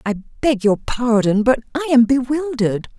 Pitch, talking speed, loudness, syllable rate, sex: 245 Hz, 160 wpm, -17 LUFS, 4.4 syllables/s, female